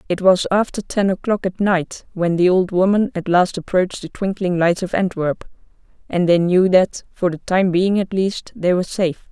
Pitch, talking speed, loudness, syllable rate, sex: 185 Hz, 205 wpm, -18 LUFS, 4.9 syllables/s, female